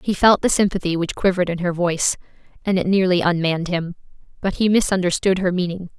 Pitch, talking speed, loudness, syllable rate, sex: 180 Hz, 190 wpm, -19 LUFS, 6.3 syllables/s, female